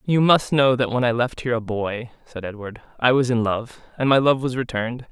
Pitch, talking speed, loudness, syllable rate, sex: 125 Hz, 245 wpm, -21 LUFS, 5.5 syllables/s, female